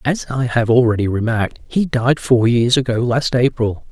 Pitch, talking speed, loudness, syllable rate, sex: 120 Hz, 185 wpm, -16 LUFS, 4.8 syllables/s, male